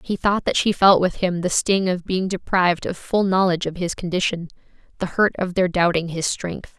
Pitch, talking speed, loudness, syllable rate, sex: 180 Hz, 220 wpm, -20 LUFS, 5.2 syllables/s, female